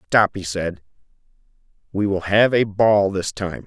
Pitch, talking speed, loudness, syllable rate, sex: 100 Hz, 165 wpm, -20 LUFS, 4.1 syllables/s, male